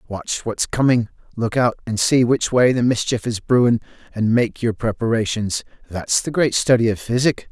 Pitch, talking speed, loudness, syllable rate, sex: 115 Hz, 185 wpm, -19 LUFS, 4.8 syllables/s, male